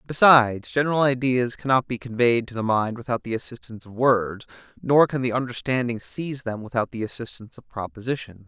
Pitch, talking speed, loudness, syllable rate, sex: 120 Hz, 175 wpm, -23 LUFS, 5.9 syllables/s, male